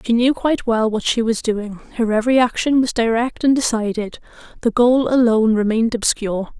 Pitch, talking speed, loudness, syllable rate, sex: 230 Hz, 180 wpm, -18 LUFS, 5.5 syllables/s, female